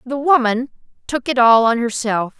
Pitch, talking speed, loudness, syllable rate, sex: 245 Hz, 175 wpm, -16 LUFS, 4.7 syllables/s, female